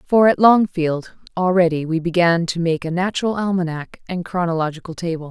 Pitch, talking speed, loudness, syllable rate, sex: 175 Hz, 160 wpm, -19 LUFS, 5.4 syllables/s, female